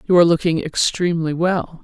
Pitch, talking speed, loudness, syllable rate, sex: 170 Hz, 165 wpm, -18 LUFS, 5.8 syllables/s, female